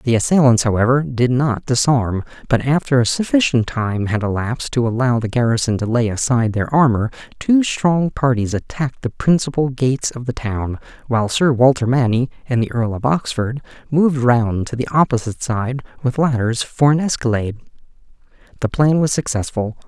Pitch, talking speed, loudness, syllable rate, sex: 125 Hz, 170 wpm, -18 LUFS, 5.3 syllables/s, male